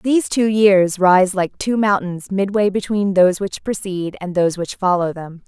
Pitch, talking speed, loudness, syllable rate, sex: 190 Hz, 185 wpm, -17 LUFS, 4.8 syllables/s, female